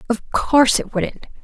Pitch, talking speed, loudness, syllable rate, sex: 245 Hz, 165 wpm, -18 LUFS, 4.6 syllables/s, female